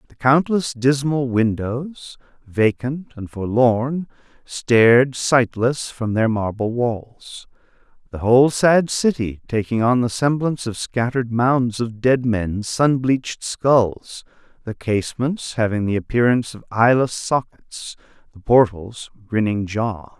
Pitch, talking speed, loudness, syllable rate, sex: 120 Hz, 120 wpm, -19 LUFS, 3.9 syllables/s, male